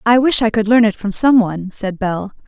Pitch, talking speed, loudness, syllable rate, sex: 215 Hz, 265 wpm, -15 LUFS, 5.4 syllables/s, female